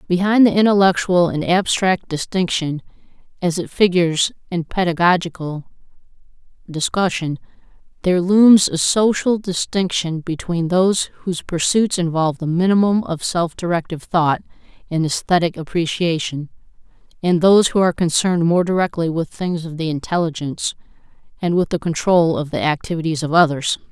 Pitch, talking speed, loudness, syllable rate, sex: 175 Hz, 130 wpm, -18 LUFS, 5.3 syllables/s, female